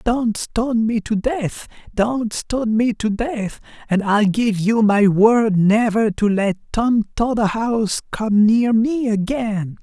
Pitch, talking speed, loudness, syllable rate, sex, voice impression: 220 Hz, 155 wpm, -18 LUFS, 3.6 syllables/s, male, masculine, adult-like, slightly bright, unique, kind